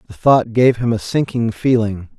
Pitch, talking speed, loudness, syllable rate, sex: 115 Hz, 190 wpm, -16 LUFS, 4.6 syllables/s, male